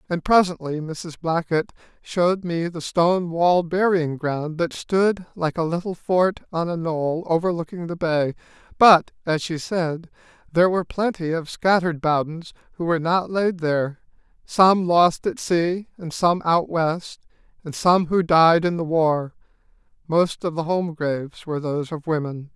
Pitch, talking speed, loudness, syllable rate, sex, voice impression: 170 Hz, 160 wpm, -21 LUFS, 4.6 syllables/s, male, masculine, middle-aged, slightly thin, relaxed, slightly weak, slightly halting, raspy, friendly, unique, lively, slightly intense, slightly sharp, light